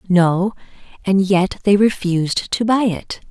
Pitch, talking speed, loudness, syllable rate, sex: 190 Hz, 145 wpm, -17 LUFS, 4.0 syllables/s, female